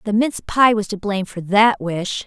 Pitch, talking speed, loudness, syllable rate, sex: 205 Hz, 240 wpm, -18 LUFS, 5.1 syllables/s, female